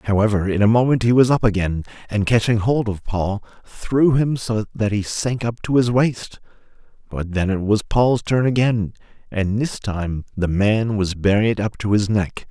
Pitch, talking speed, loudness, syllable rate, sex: 110 Hz, 195 wpm, -19 LUFS, 4.5 syllables/s, male